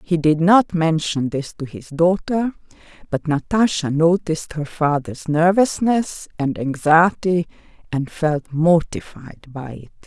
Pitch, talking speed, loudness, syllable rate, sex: 160 Hz, 125 wpm, -19 LUFS, 3.9 syllables/s, female